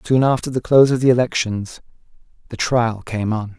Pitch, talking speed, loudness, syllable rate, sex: 120 Hz, 185 wpm, -18 LUFS, 5.5 syllables/s, male